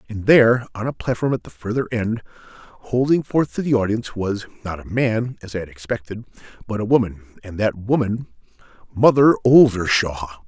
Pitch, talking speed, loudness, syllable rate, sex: 110 Hz, 160 wpm, -20 LUFS, 5.4 syllables/s, male